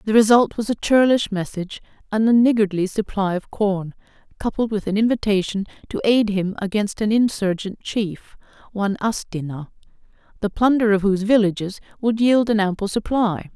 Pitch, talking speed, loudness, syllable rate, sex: 210 Hz, 155 wpm, -20 LUFS, 5.2 syllables/s, female